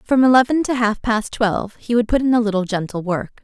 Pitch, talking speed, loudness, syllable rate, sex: 225 Hz, 245 wpm, -18 LUFS, 5.8 syllables/s, female